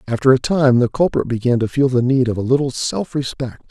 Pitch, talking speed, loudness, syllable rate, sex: 130 Hz, 245 wpm, -17 LUFS, 5.7 syllables/s, male